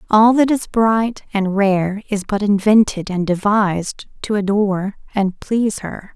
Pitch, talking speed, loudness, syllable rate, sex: 205 Hz, 155 wpm, -17 LUFS, 4.1 syllables/s, female